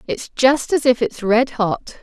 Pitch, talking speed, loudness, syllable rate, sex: 240 Hz, 235 wpm, -18 LUFS, 4.4 syllables/s, female